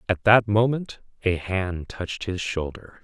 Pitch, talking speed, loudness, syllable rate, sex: 100 Hz, 160 wpm, -24 LUFS, 4.2 syllables/s, male